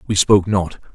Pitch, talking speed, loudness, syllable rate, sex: 95 Hz, 190 wpm, -16 LUFS, 6.2 syllables/s, male